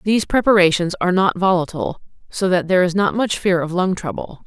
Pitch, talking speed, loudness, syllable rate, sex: 185 Hz, 200 wpm, -18 LUFS, 6.2 syllables/s, female